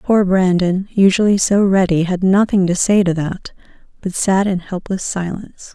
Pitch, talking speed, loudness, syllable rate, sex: 190 Hz, 165 wpm, -16 LUFS, 4.7 syllables/s, female